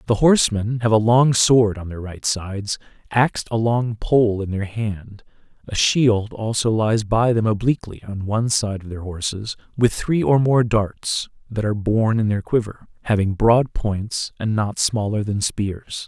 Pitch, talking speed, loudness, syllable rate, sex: 110 Hz, 185 wpm, -20 LUFS, 4.4 syllables/s, male